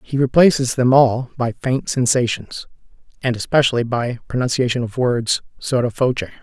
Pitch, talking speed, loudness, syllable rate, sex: 125 Hz, 140 wpm, -18 LUFS, 5.2 syllables/s, male